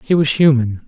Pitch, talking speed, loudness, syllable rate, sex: 140 Hz, 205 wpm, -14 LUFS, 5.2 syllables/s, male